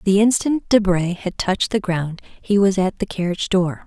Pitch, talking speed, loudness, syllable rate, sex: 190 Hz, 200 wpm, -19 LUFS, 4.9 syllables/s, female